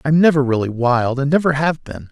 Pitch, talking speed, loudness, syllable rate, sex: 140 Hz, 225 wpm, -17 LUFS, 5.5 syllables/s, male